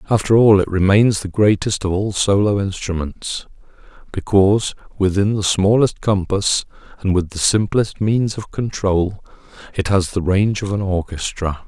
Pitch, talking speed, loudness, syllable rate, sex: 100 Hz, 150 wpm, -18 LUFS, 4.6 syllables/s, male